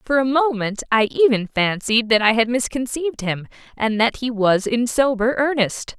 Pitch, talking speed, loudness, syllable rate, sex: 235 Hz, 180 wpm, -19 LUFS, 4.7 syllables/s, female